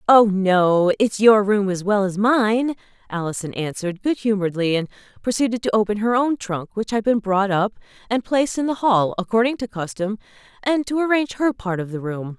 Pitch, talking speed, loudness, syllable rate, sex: 215 Hz, 200 wpm, -20 LUFS, 5.4 syllables/s, female